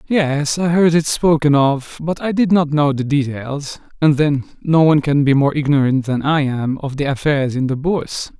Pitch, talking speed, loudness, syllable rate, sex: 145 Hz, 215 wpm, -16 LUFS, 4.8 syllables/s, male